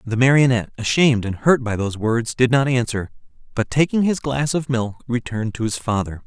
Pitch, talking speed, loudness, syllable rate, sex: 120 Hz, 200 wpm, -20 LUFS, 5.7 syllables/s, male